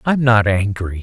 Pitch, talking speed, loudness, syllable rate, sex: 110 Hz, 235 wpm, -16 LUFS, 5.4 syllables/s, male